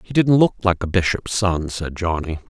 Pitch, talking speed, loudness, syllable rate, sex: 95 Hz, 210 wpm, -20 LUFS, 4.9 syllables/s, male